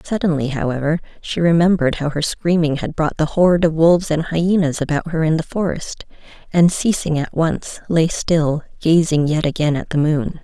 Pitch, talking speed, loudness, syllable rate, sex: 160 Hz, 185 wpm, -18 LUFS, 5.1 syllables/s, female